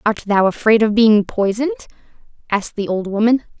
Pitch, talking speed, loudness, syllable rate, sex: 210 Hz, 165 wpm, -16 LUFS, 5.8 syllables/s, female